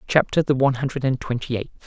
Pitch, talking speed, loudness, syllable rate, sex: 130 Hz, 225 wpm, -22 LUFS, 7.0 syllables/s, male